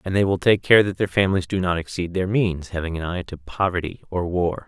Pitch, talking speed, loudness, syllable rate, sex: 90 Hz, 255 wpm, -22 LUFS, 5.8 syllables/s, male